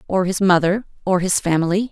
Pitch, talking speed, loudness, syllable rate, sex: 185 Hz, 155 wpm, -18 LUFS, 5.8 syllables/s, female